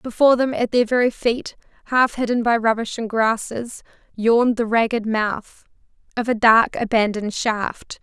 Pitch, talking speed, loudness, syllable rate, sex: 230 Hz, 155 wpm, -19 LUFS, 4.8 syllables/s, female